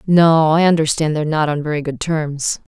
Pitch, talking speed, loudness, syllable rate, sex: 155 Hz, 195 wpm, -16 LUFS, 5.2 syllables/s, female